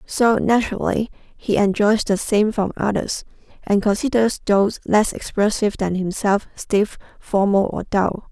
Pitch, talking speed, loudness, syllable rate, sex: 205 Hz, 135 wpm, -19 LUFS, 4.5 syllables/s, female